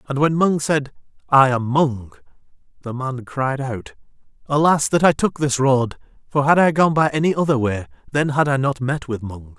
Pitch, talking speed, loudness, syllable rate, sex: 135 Hz, 200 wpm, -19 LUFS, 4.8 syllables/s, male